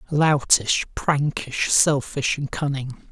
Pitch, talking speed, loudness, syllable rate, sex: 140 Hz, 95 wpm, -21 LUFS, 3.3 syllables/s, male